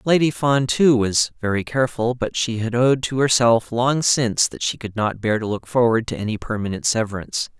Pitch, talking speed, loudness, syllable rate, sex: 120 Hz, 205 wpm, -20 LUFS, 5.5 syllables/s, male